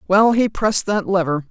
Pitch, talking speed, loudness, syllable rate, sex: 195 Hz, 200 wpm, -17 LUFS, 5.3 syllables/s, female